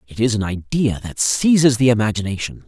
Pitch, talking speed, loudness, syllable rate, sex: 115 Hz, 180 wpm, -18 LUFS, 5.7 syllables/s, male